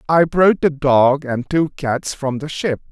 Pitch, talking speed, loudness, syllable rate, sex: 145 Hz, 205 wpm, -17 LUFS, 3.8 syllables/s, male